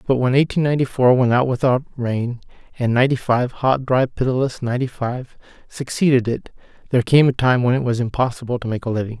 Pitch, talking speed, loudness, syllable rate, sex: 125 Hz, 200 wpm, -19 LUFS, 6.1 syllables/s, male